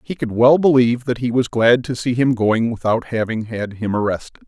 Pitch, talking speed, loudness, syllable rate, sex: 120 Hz, 230 wpm, -18 LUFS, 5.4 syllables/s, male